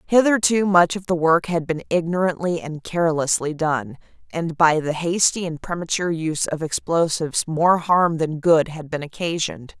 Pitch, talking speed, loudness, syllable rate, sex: 165 Hz, 165 wpm, -20 LUFS, 5.0 syllables/s, female